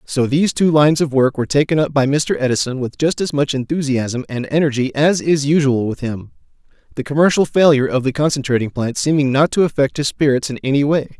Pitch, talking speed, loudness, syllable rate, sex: 140 Hz, 215 wpm, -16 LUFS, 6.0 syllables/s, male